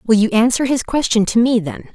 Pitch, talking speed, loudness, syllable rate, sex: 230 Hz, 245 wpm, -16 LUFS, 6.0 syllables/s, female